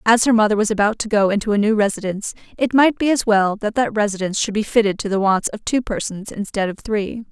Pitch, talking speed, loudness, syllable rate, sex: 215 Hz, 255 wpm, -19 LUFS, 6.2 syllables/s, female